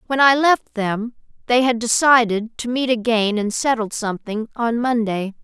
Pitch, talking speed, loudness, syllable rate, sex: 230 Hz, 165 wpm, -19 LUFS, 4.6 syllables/s, female